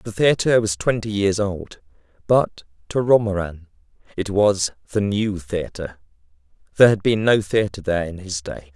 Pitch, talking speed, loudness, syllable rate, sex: 100 Hz, 160 wpm, -20 LUFS, 4.7 syllables/s, male